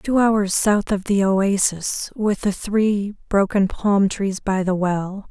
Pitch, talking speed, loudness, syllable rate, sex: 200 Hz, 170 wpm, -20 LUFS, 3.3 syllables/s, female